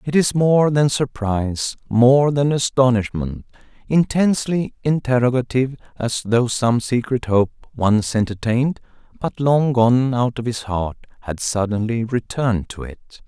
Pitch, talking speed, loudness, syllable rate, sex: 125 Hz, 120 wpm, -19 LUFS, 4.4 syllables/s, male